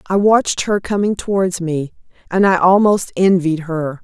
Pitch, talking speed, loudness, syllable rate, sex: 185 Hz, 165 wpm, -16 LUFS, 4.6 syllables/s, female